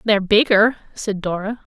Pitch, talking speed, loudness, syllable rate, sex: 210 Hz, 135 wpm, -18 LUFS, 4.9 syllables/s, female